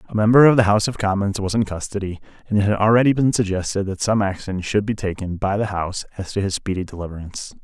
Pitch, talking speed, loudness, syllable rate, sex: 100 Hz, 235 wpm, -20 LUFS, 6.7 syllables/s, male